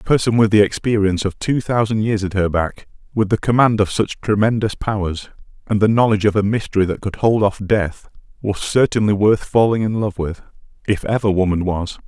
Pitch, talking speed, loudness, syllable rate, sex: 105 Hz, 205 wpm, -18 LUFS, 5.6 syllables/s, male